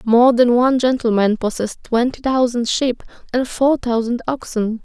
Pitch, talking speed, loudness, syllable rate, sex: 240 Hz, 150 wpm, -17 LUFS, 4.8 syllables/s, female